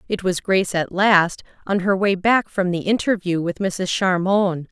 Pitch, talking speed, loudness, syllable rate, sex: 190 Hz, 190 wpm, -20 LUFS, 4.4 syllables/s, female